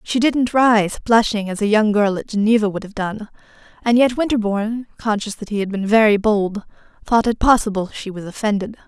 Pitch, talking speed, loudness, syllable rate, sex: 215 Hz, 195 wpm, -18 LUFS, 5.4 syllables/s, female